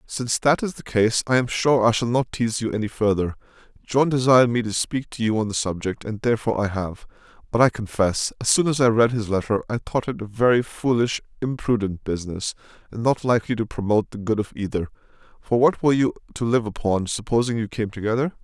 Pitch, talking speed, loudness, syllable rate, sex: 115 Hz, 220 wpm, -22 LUFS, 6.1 syllables/s, male